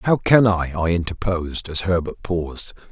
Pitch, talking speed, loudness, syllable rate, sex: 90 Hz, 165 wpm, -20 LUFS, 4.8 syllables/s, male